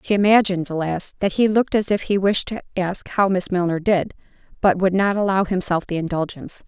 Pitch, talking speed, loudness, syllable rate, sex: 190 Hz, 205 wpm, -20 LUFS, 5.8 syllables/s, female